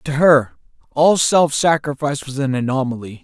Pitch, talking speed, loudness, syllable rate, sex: 140 Hz, 150 wpm, -17 LUFS, 4.9 syllables/s, male